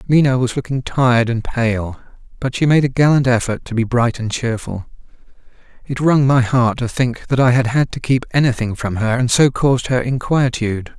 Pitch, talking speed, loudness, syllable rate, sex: 125 Hz, 200 wpm, -17 LUFS, 5.2 syllables/s, male